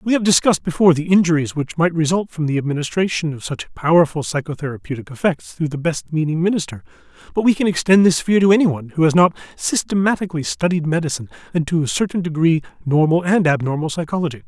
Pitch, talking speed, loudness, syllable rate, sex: 165 Hz, 185 wpm, -18 LUFS, 6.6 syllables/s, male